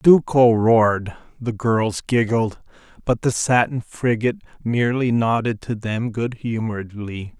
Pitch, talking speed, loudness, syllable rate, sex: 115 Hz, 120 wpm, -20 LUFS, 4.2 syllables/s, male